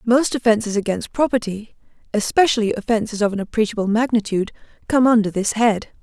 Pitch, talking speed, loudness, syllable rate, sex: 220 Hz, 140 wpm, -19 LUFS, 6.1 syllables/s, female